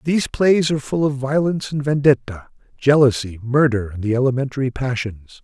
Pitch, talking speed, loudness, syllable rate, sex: 135 Hz, 155 wpm, -19 LUFS, 5.6 syllables/s, male